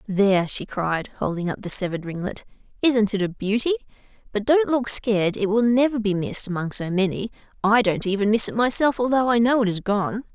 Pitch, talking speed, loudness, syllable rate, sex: 215 Hz, 210 wpm, -22 LUFS, 5.7 syllables/s, female